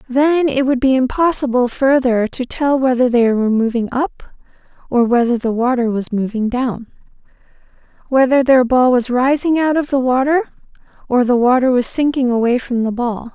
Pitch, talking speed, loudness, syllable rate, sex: 255 Hz, 170 wpm, -15 LUFS, 5.0 syllables/s, female